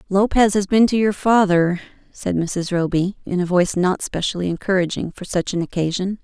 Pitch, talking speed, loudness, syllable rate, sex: 190 Hz, 185 wpm, -19 LUFS, 5.4 syllables/s, female